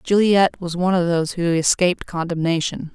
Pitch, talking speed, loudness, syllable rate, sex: 175 Hz, 165 wpm, -19 LUFS, 6.0 syllables/s, female